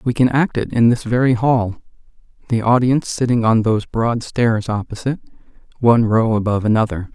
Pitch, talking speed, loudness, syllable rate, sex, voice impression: 115 Hz, 170 wpm, -17 LUFS, 5.8 syllables/s, male, very masculine, very adult-like, very middle-aged, very thick, relaxed, weak, dark, slightly soft, muffled, slightly fluent, cool, very intellectual, slightly refreshing, very sincere, very calm, friendly, very reassuring, unique, very elegant, very sweet, very kind, modest